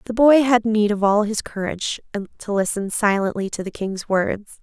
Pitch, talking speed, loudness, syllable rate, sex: 210 Hz, 195 wpm, -20 LUFS, 4.8 syllables/s, female